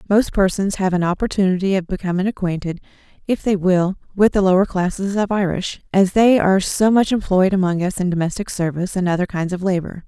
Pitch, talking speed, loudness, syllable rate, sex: 190 Hz, 195 wpm, -18 LUFS, 5.9 syllables/s, female